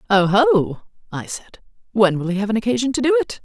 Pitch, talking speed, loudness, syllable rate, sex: 220 Hz, 190 wpm, -18 LUFS, 5.5 syllables/s, female